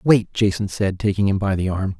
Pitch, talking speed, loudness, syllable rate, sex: 100 Hz, 240 wpm, -20 LUFS, 5.2 syllables/s, male